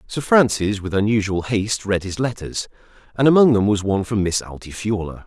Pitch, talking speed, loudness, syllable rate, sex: 105 Hz, 180 wpm, -19 LUFS, 5.6 syllables/s, male